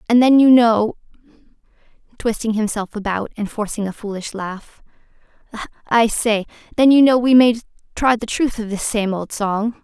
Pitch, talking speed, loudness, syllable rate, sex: 225 Hz, 155 wpm, -17 LUFS, 5.0 syllables/s, female